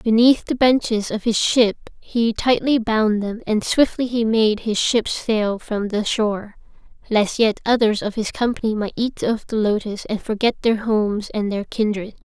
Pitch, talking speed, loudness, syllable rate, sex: 220 Hz, 185 wpm, -20 LUFS, 4.5 syllables/s, female